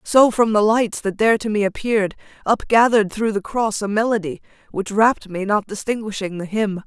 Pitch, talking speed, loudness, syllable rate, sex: 210 Hz, 190 wpm, -19 LUFS, 5.4 syllables/s, female